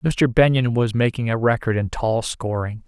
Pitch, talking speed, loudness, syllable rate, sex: 120 Hz, 190 wpm, -20 LUFS, 4.6 syllables/s, male